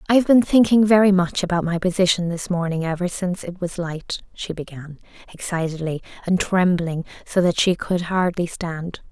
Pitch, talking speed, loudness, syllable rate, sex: 180 Hz, 170 wpm, -21 LUFS, 5.2 syllables/s, female